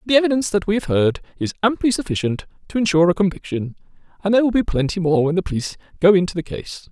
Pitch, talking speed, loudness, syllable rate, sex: 185 Hz, 225 wpm, -19 LUFS, 7.3 syllables/s, male